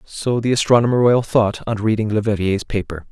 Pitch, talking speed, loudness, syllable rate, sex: 110 Hz, 175 wpm, -18 LUFS, 5.4 syllables/s, male